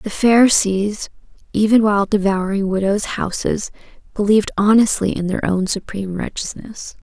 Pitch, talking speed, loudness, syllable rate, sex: 205 Hz, 120 wpm, -17 LUFS, 5.0 syllables/s, female